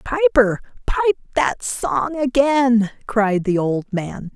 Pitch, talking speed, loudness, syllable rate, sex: 240 Hz, 125 wpm, -19 LUFS, 3.4 syllables/s, female